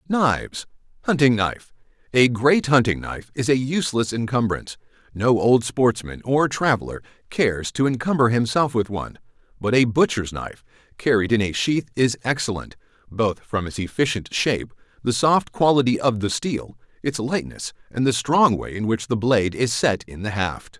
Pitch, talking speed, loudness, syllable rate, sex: 120 Hz, 160 wpm, -21 LUFS, 5.2 syllables/s, male